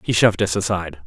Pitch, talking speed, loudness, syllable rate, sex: 95 Hz, 225 wpm, -19 LUFS, 7.6 syllables/s, male